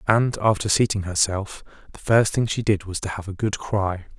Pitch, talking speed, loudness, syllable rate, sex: 100 Hz, 215 wpm, -22 LUFS, 5.1 syllables/s, male